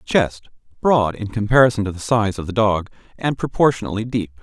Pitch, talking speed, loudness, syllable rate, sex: 110 Hz, 165 wpm, -19 LUFS, 5.7 syllables/s, male